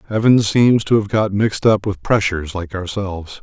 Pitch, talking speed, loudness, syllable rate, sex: 100 Hz, 195 wpm, -17 LUFS, 5.3 syllables/s, male